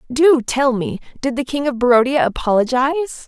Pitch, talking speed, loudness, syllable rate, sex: 260 Hz, 165 wpm, -17 LUFS, 5.3 syllables/s, female